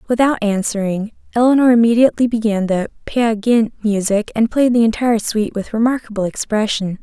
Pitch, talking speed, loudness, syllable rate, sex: 220 Hz, 145 wpm, -16 LUFS, 5.6 syllables/s, female